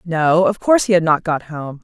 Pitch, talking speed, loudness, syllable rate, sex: 170 Hz, 260 wpm, -16 LUFS, 5.2 syllables/s, female